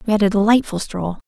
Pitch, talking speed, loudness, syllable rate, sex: 205 Hz, 235 wpm, -18 LUFS, 6.5 syllables/s, female